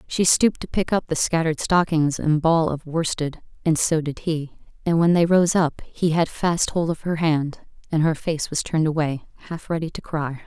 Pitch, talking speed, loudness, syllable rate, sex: 160 Hz, 220 wpm, -22 LUFS, 5.0 syllables/s, female